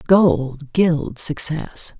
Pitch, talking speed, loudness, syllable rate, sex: 155 Hz, 90 wpm, -19 LUFS, 2.2 syllables/s, female